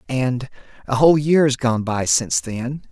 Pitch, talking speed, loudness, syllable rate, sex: 130 Hz, 145 wpm, -19 LUFS, 4.2 syllables/s, male